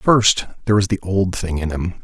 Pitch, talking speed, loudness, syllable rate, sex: 95 Hz, 235 wpm, -19 LUFS, 5.3 syllables/s, male